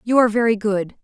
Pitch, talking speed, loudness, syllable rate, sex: 220 Hz, 230 wpm, -18 LUFS, 6.6 syllables/s, female